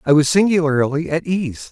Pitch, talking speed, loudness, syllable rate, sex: 155 Hz, 175 wpm, -17 LUFS, 5.0 syllables/s, male